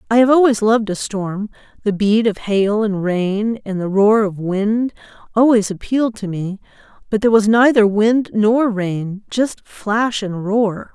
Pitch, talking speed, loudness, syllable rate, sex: 215 Hz, 170 wpm, -17 LUFS, 4.1 syllables/s, female